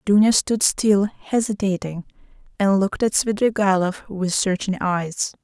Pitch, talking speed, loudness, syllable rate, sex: 200 Hz, 120 wpm, -20 LUFS, 4.3 syllables/s, female